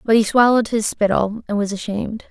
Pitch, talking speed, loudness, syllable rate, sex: 215 Hz, 210 wpm, -18 LUFS, 6.0 syllables/s, female